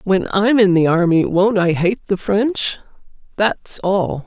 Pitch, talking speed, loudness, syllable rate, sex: 190 Hz, 155 wpm, -16 LUFS, 3.6 syllables/s, female